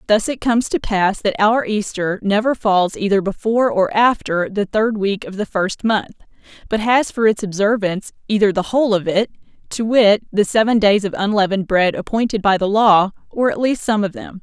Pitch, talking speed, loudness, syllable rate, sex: 205 Hz, 205 wpm, -17 LUFS, 5.3 syllables/s, female